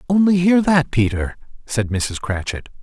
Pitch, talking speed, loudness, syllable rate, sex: 140 Hz, 150 wpm, -19 LUFS, 4.5 syllables/s, male